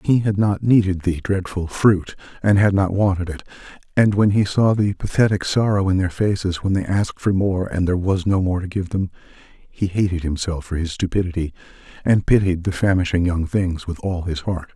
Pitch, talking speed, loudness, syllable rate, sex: 95 Hz, 205 wpm, -20 LUFS, 5.3 syllables/s, male